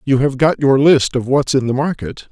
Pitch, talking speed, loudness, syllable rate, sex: 135 Hz, 260 wpm, -15 LUFS, 5.1 syllables/s, male